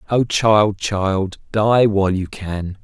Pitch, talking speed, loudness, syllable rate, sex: 100 Hz, 150 wpm, -18 LUFS, 3.2 syllables/s, male